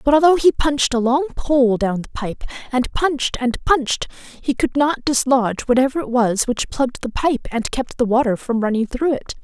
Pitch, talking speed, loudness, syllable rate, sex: 260 Hz, 210 wpm, -19 LUFS, 5.2 syllables/s, female